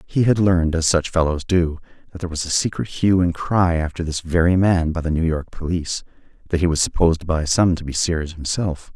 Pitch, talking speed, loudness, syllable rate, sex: 85 Hz, 230 wpm, -20 LUFS, 5.6 syllables/s, male